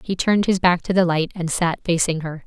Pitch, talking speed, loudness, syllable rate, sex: 175 Hz, 270 wpm, -20 LUFS, 5.7 syllables/s, female